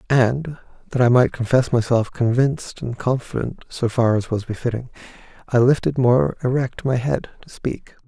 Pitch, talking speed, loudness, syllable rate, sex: 125 Hz, 165 wpm, -20 LUFS, 4.8 syllables/s, male